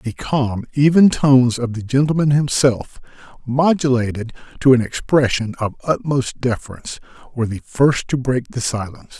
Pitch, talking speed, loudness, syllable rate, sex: 130 Hz, 145 wpm, -17 LUFS, 5.0 syllables/s, male